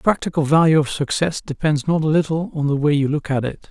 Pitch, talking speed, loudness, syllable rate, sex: 155 Hz, 260 wpm, -19 LUFS, 6.1 syllables/s, male